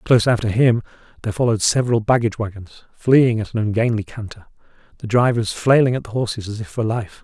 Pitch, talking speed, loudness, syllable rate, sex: 110 Hz, 190 wpm, -19 LUFS, 6.4 syllables/s, male